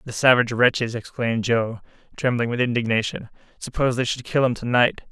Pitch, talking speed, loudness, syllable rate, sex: 120 Hz, 175 wpm, -21 LUFS, 6.1 syllables/s, male